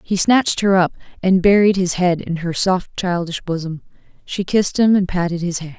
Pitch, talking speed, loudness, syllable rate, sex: 180 Hz, 205 wpm, -17 LUFS, 5.3 syllables/s, female